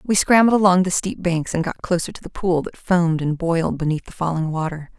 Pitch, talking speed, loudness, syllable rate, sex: 170 Hz, 240 wpm, -20 LUFS, 5.9 syllables/s, female